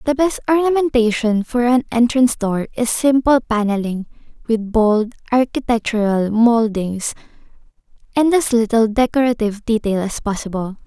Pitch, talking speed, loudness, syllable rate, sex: 230 Hz, 115 wpm, -17 LUFS, 4.9 syllables/s, female